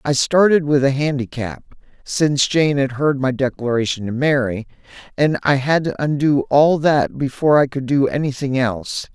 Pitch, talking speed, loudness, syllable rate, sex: 140 Hz, 170 wpm, -18 LUFS, 5.0 syllables/s, male